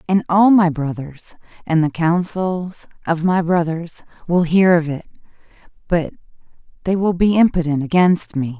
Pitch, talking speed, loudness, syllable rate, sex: 170 Hz, 145 wpm, -17 LUFS, 4.4 syllables/s, female